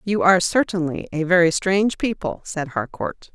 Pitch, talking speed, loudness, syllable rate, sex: 180 Hz, 160 wpm, -20 LUFS, 5.1 syllables/s, female